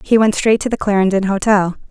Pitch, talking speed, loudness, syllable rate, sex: 200 Hz, 220 wpm, -15 LUFS, 5.9 syllables/s, female